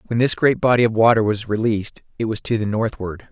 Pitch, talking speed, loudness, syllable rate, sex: 110 Hz, 235 wpm, -19 LUFS, 6.0 syllables/s, male